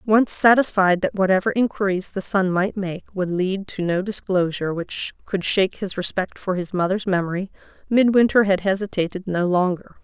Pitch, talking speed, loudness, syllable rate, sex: 190 Hz, 165 wpm, -21 LUFS, 5.1 syllables/s, female